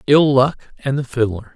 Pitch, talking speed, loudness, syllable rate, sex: 130 Hz, 195 wpm, -18 LUFS, 4.4 syllables/s, male